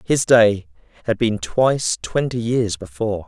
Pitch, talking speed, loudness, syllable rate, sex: 110 Hz, 145 wpm, -19 LUFS, 4.4 syllables/s, male